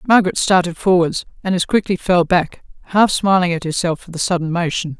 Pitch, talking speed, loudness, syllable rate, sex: 180 Hz, 190 wpm, -17 LUFS, 5.7 syllables/s, female